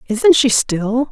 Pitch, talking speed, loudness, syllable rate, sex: 240 Hz, 160 wpm, -14 LUFS, 3.2 syllables/s, female